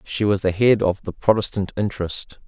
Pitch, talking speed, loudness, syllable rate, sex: 100 Hz, 195 wpm, -21 LUFS, 5.3 syllables/s, male